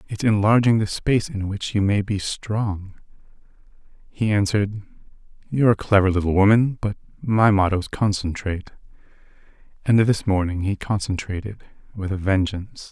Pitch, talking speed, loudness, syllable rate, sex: 100 Hz, 135 wpm, -21 LUFS, 5.1 syllables/s, male